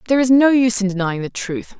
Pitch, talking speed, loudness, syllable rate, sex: 220 Hz, 265 wpm, -16 LUFS, 6.9 syllables/s, female